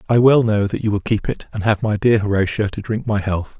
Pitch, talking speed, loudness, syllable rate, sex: 105 Hz, 285 wpm, -18 LUFS, 5.6 syllables/s, male